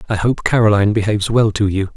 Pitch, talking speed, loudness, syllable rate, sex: 105 Hz, 215 wpm, -15 LUFS, 7.0 syllables/s, male